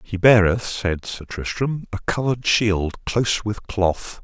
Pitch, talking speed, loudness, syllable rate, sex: 105 Hz, 155 wpm, -21 LUFS, 3.9 syllables/s, male